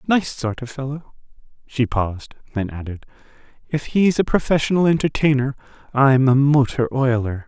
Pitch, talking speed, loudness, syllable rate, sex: 135 Hz, 135 wpm, -19 LUFS, 5.0 syllables/s, male